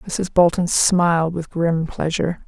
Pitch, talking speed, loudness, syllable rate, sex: 170 Hz, 145 wpm, -19 LUFS, 4.3 syllables/s, female